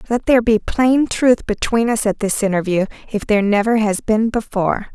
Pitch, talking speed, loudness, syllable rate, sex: 220 Hz, 195 wpm, -17 LUFS, 5.4 syllables/s, female